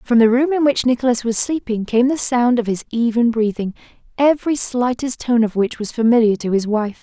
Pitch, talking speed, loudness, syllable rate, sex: 240 Hz, 215 wpm, -17 LUFS, 5.4 syllables/s, female